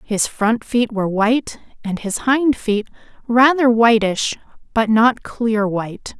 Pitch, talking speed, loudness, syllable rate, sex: 225 Hz, 145 wpm, -17 LUFS, 4.0 syllables/s, female